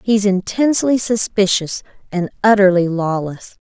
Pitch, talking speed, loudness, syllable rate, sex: 195 Hz, 100 wpm, -16 LUFS, 4.5 syllables/s, female